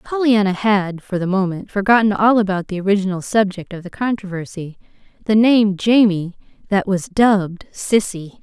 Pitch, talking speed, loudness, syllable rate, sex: 200 Hz, 140 wpm, -17 LUFS, 5.1 syllables/s, female